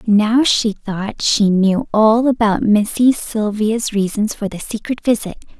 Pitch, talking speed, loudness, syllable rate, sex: 215 Hz, 150 wpm, -16 LUFS, 3.8 syllables/s, female